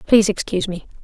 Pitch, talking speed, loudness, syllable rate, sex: 195 Hz, 175 wpm, -19 LUFS, 7.9 syllables/s, female